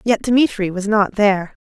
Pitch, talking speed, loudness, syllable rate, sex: 205 Hz, 185 wpm, -17 LUFS, 4.8 syllables/s, female